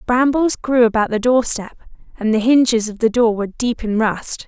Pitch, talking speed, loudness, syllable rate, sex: 230 Hz, 200 wpm, -17 LUFS, 5.1 syllables/s, female